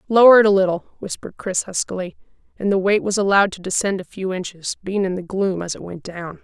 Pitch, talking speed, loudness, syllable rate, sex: 190 Hz, 235 wpm, -19 LUFS, 6.2 syllables/s, female